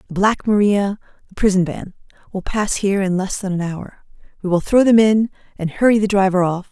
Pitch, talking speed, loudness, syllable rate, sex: 195 Hz, 215 wpm, -17 LUFS, 5.6 syllables/s, female